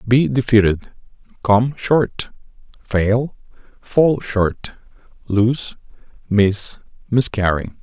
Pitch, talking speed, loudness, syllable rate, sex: 115 Hz, 75 wpm, -18 LUFS, 2.8 syllables/s, male